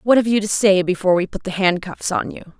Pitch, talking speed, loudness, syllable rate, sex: 195 Hz, 275 wpm, -18 LUFS, 6.1 syllables/s, female